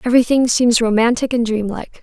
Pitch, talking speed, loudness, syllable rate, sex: 235 Hz, 150 wpm, -16 LUFS, 6.2 syllables/s, female